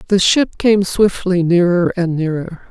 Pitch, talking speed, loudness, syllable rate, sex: 180 Hz, 155 wpm, -15 LUFS, 4.0 syllables/s, female